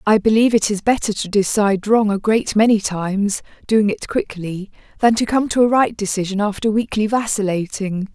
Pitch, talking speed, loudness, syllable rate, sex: 210 Hz, 170 wpm, -18 LUFS, 5.3 syllables/s, female